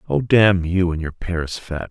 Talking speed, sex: 220 wpm, male